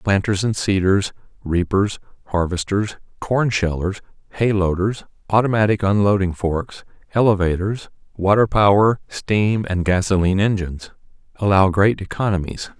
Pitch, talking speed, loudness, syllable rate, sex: 100 Hz, 105 wpm, -19 LUFS, 4.7 syllables/s, male